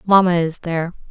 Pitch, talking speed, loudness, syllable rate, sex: 175 Hz, 160 wpm, -18 LUFS, 6.0 syllables/s, female